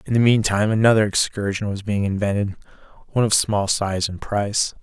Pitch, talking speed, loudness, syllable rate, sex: 105 Hz, 185 wpm, -20 LUFS, 5.6 syllables/s, male